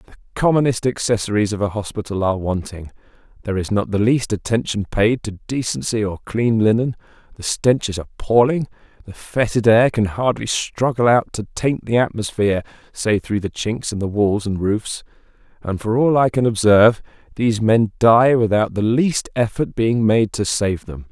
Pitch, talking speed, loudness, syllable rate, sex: 110 Hz, 175 wpm, -18 LUFS, 5.0 syllables/s, male